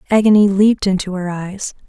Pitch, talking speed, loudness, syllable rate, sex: 195 Hz, 160 wpm, -15 LUFS, 5.8 syllables/s, female